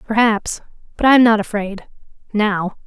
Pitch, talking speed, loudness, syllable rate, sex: 215 Hz, 125 wpm, -16 LUFS, 4.8 syllables/s, female